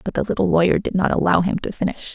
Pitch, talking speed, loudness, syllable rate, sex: 185 Hz, 280 wpm, -20 LUFS, 6.8 syllables/s, female